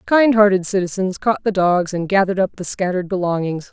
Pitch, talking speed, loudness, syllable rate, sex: 190 Hz, 195 wpm, -18 LUFS, 6.0 syllables/s, female